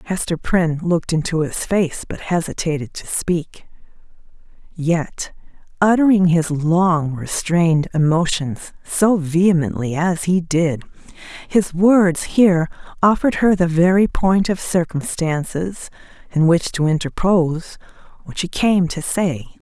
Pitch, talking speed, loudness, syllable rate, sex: 170 Hz, 120 wpm, -18 LUFS, 4.2 syllables/s, female